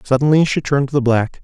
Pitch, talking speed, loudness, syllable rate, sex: 135 Hz, 250 wpm, -16 LUFS, 6.8 syllables/s, male